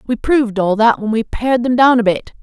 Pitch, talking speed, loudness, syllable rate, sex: 230 Hz, 270 wpm, -14 LUFS, 5.8 syllables/s, female